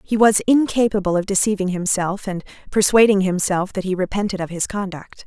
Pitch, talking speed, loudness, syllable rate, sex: 195 Hz, 170 wpm, -19 LUFS, 5.6 syllables/s, female